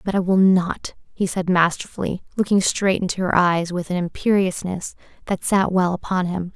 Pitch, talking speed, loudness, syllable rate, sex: 185 Hz, 185 wpm, -20 LUFS, 5.0 syllables/s, female